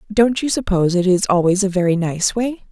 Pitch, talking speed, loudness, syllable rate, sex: 195 Hz, 220 wpm, -17 LUFS, 5.6 syllables/s, female